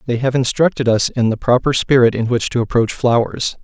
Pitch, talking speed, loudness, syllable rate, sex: 120 Hz, 215 wpm, -16 LUFS, 5.5 syllables/s, male